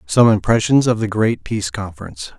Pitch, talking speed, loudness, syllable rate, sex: 110 Hz, 175 wpm, -17 LUFS, 5.8 syllables/s, male